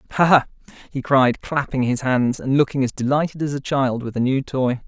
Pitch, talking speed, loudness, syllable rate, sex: 135 Hz, 220 wpm, -20 LUFS, 5.4 syllables/s, male